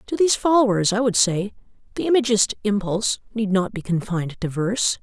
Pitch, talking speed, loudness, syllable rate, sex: 210 Hz, 180 wpm, -21 LUFS, 5.8 syllables/s, female